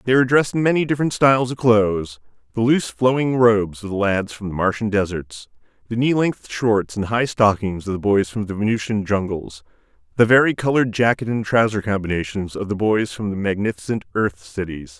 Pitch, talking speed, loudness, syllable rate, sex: 110 Hz, 195 wpm, -20 LUFS, 5.7 syllables/s, male